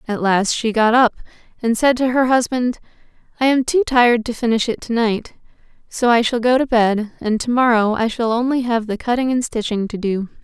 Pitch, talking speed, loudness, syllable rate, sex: 235 Hz, 220 wpm, -17 LUFS, 5.4 syllables/s, female